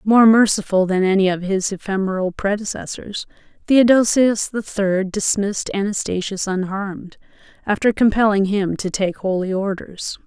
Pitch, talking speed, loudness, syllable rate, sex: 200 Hz, 125 wpm, -19 LUFS, 4.8 syllables/s, female